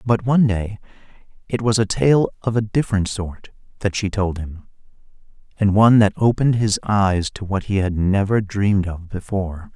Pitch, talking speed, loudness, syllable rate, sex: 100 Hz, 180 wpm, -19 LUFS, 5.2 syllables/s, male